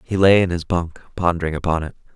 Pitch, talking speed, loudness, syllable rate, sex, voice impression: 85 Hz, 225 wpm, -19 LUFS, 6.3 syllables/s, male, masculine, adult-like, tensed, powerful, clear, fluent, cool, intellectual, friendly, wild, lively